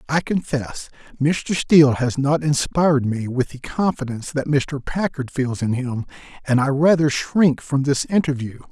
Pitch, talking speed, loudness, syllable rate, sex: 140 Hz, 165 wpm, -20 LUFS, 4.5 syllables/s, male